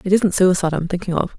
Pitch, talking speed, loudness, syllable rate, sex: 185 Hz, 305 wpm, -18 LUFS, 7.8 syllables/s, female